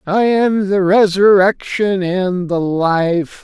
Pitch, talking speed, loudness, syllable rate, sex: 190 Hz, 120 wpm, -14 LUFS, 3.5 syllables/s, male